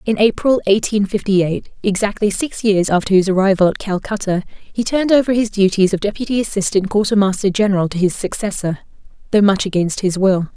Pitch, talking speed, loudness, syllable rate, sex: 200 Hz, 170 wpm, -16 LUFS, 5.9 syllables/s, female